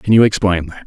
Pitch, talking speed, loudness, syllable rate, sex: 95 Hz, 275 wpm, -15 LUFS, 6.0 syllables/s, male